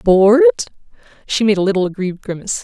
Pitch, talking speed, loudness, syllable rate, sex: 200 Hz, 160 wpm, -15 LUFS, 7.5 syllables/s, female